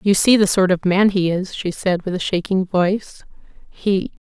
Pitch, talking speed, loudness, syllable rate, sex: 190 Hz, 210 wpm, -18 LUFS, 4.7 syllables/s, female